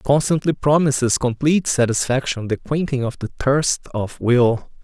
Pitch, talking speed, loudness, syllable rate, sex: 130 Hz, 150 wpm, -19 LUFS, 4.9 syllables/s, male